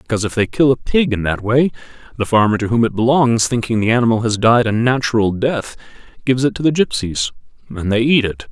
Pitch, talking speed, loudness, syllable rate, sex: 115 Hz, 225 wpm, -16 LUFS, 6.0 syllables/s, male